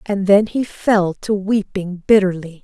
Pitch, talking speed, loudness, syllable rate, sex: 195 Hz, 160 wpm, -17 LUFS, 4.0 syllables/s, female